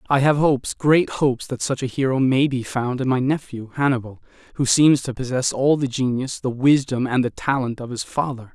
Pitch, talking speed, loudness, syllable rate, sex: 130 Hz, 220 wpm, -20 LUFS, 5.3 syllables/s, male